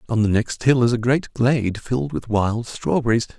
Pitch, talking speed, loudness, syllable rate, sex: 115 Hz, 215 wpm, -20 LUFS, 5.1 syllables/s, male